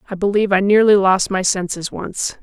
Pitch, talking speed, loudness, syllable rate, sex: 195 Hz, 200 wpm, -16 LUFS, 5.4 syllables/s, female